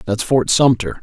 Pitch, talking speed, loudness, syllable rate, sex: 115 Hz, 175 wpm, -15 LUFS, 4.6 syllables/s, male